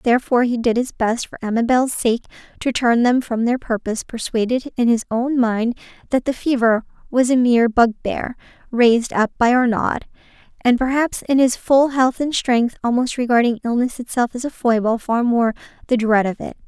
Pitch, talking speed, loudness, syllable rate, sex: 240 Hz, 185 wpm, -18 LUFS, 5.2 syllables/s, female